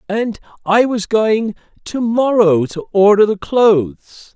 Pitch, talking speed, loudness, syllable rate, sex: 210 Hz, 140 wpm, -14 LUFS, 3.6 syllables/s, male